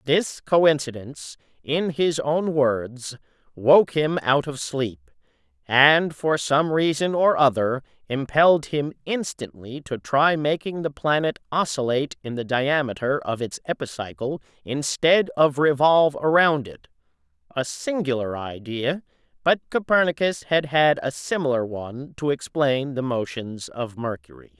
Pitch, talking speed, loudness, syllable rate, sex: 140 Hz, 125 wpm, -22 LUFS, 4.2 syllables/s, male